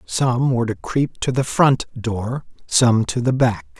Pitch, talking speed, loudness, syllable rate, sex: 125 Hz, 190 wpm, -19 LUFS, 4.0 syllables/s, male